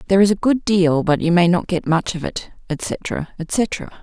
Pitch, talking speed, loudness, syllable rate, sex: 180 Hz, 225 wpm, -19 LUFS, 4.6 syllables/s, female